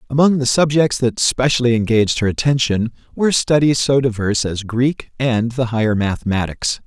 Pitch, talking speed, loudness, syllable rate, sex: 125 Hz, 155 wpm, -17 LUFS, 5.3 syllables/s, male